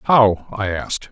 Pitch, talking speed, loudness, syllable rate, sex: 105 Hz, 160 wpm, -18 LUFS, 4.0 syllables/s, male